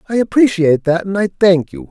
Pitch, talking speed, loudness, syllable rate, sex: 190 Hz, 220 wpm, -14 LUFS, 5.8 syllables/s, male